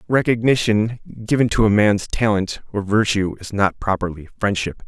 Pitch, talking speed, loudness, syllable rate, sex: 105 Hz, 150 wpm, -19 LUFS, 4.7 syllables/s, male